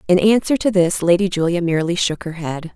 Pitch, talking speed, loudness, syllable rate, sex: 180 Hz, 220 wpm, -18 LUFS, 5.9 syllables/s, female